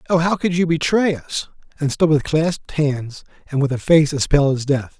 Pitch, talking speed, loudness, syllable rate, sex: 150 Hz, 215 wpm, -19 LUFS, 4.7 syllables/s, male